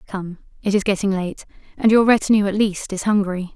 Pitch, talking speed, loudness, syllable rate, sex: 200 Hz, 200 wpm, -19 LUFS, 5.7 syllables/s, female